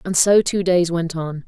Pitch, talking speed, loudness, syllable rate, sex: 175 Hz, 245 wpm, -18 LUFS, 4.4 syllables/s, female